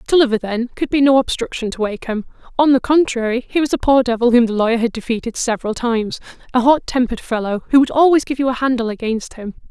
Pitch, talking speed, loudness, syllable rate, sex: 245 Hz, 225 wpm, -17 LUFS, 6.5 syllables/s, female